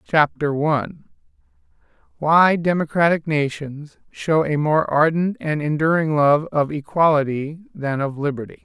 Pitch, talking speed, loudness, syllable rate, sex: 155 Hz, 120 wpm, -19 LUFS, 4.3 syllables/s, male